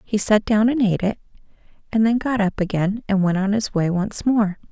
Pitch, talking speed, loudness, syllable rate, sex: 210 Hz, 230 wpm, -20 LUFS, 5.3 syllables/s, female